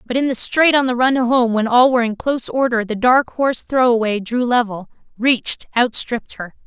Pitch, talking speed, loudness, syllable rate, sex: 240 Hz, 205 wpm, -17 LUFS, 5.5 syllables/s, female